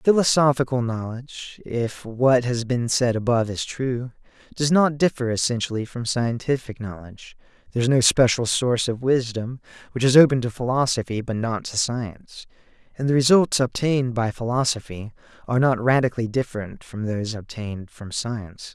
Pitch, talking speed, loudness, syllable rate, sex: 120 Hz, 155 wpm, -22 LUFS, 5.3 syllables/s, male